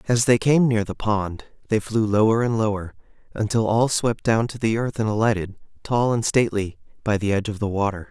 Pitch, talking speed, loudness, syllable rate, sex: 110 Hz, 215 wpm, -22 LUFS, 5.5 syllables/s, male